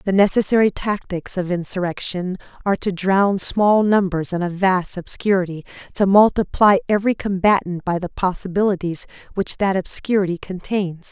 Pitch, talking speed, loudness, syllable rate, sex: 190 Hz, 135 wpm, -19 LUFS, 5.1 syllables/s, female